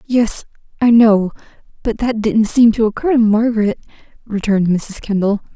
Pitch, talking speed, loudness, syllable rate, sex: 220 Hz, 150 wpm, -15 LUFS, 5.0 syllables/s, female